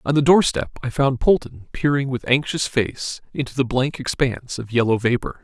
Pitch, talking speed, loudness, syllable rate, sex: 130 Hz, 190 wpm, -20 LUFS, 5.1 syllables/s, male